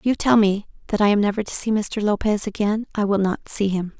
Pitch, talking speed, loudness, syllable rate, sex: 205 Hz, 270 wpm, -21 LUFS, 5.9 syllables/s, female